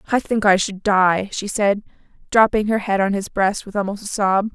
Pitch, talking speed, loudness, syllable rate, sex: 200 Hz, 225 wpm, -19 LUFS, 5.0 syllables/s, female